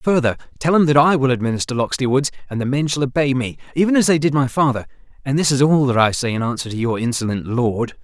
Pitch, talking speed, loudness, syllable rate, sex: 135 Hz, 255 wpm, -18 LUFS, 6.4 syllables/s, male